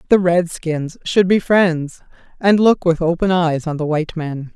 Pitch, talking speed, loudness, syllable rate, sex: 170 Hz, 200 wpm, -17 LUFS, 4.4 syllables/s, female